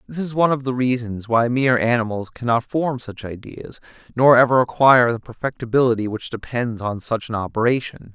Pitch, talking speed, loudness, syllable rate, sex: 120 Hz, 175 wpm, -19 LUFS, 5.6 syllables/s, male